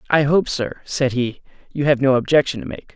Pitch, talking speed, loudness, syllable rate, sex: 135 Hz, 225 wpm, -19 LUFS, 5.5 syllables/s, male